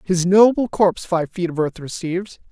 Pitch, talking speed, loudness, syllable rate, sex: 180 Hz, 190 wpm, -19 LUFS, 5.1 syllables/s, male